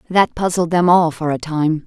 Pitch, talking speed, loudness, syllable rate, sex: 165 Hz, 225 wpm, -16 LUFS, 4.8 syllables/s, female